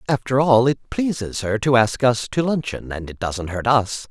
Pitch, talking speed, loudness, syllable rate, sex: 120 Hz, 220 wpm, -20 LUFS, 4.6 syllables/s, male